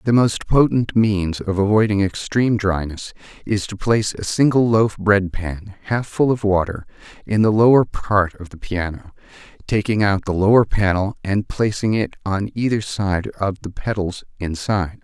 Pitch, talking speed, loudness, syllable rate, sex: 100 Hz, 170 wpm, -19 LUFS, 4.7 syllables/s, male